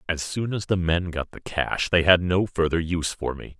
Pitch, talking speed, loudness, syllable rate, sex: 85 Hz, 250 wpm, -24 LUFS, 5.0 syllables/s, male